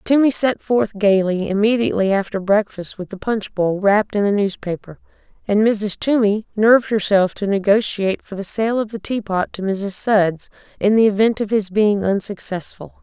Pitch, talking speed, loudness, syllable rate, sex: 205 Hz, 175 wpm, -18 LUFS, 5.0 syllables/s, female